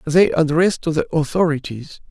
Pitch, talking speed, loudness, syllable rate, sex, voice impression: 155 Hz, 140 wpm, -18 LUFS, 5.4 syllables/s, male, very masculine, very adult-like, middle-aged, slightly thick, slightly relaxed, slightly weak, slightly dark, slightly soft, clear, fluent, slightly cool, intellectual, refreshing, very sincere, calm, slightly mature, slightly friendly, slightly reassuring, unique, slightly elegant, slightly sweet, kind, very modest, slightly light